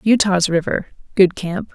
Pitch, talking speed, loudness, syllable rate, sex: 190 Hz, 105 wpm, -18 LUFS, 4.4 syllables/s, female